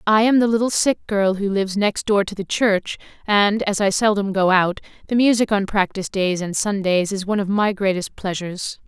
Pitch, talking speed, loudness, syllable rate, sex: 200 Hz, 215 wpm, -19 LUFS, 5.3 syllables/s, female